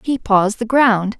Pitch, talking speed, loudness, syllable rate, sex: 225 Hz, 200 wpm, -15 LUFS, 3.7 syllables/s, female